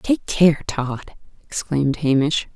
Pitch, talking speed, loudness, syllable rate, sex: 150 Hz, 115 wpm, -20 LUFS, 3.7 syllables/s, female